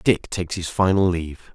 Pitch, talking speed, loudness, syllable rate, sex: 90 Hz, 195 wpm, -22 LUFS, 5.5 syllables/s, male